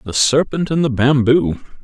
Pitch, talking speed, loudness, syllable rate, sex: 135 Hz, 165 wpm, -15 LUFS, 4.8 syllables/s, male